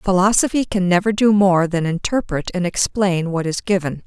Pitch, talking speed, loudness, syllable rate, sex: 185 Hz, 175 wpm, -18 LUFS, 5.0 syllables/s, female